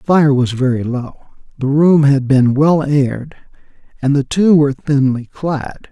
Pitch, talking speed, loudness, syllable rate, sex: 140 Hz, 170 wpm, -14 LUFS, 4.3 syllables/s, male